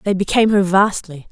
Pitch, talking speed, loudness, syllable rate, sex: 195 Hz, 185 wpm, -15 LUFS, 5.9 syllables/s, female